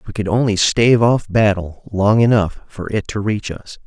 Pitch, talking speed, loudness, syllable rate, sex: 105 Hz, 215 wpm, -16 LUFS, 4.9 syllables/s, male